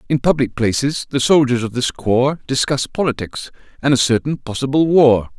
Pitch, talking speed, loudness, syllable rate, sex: 130 Hz, 165 wpm, -17 LUFS, 5.1 syllables/s, male